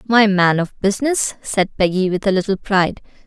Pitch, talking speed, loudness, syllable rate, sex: 200 Hz, 185 wpm, -17 LUFS, 5.4 syllables/s, female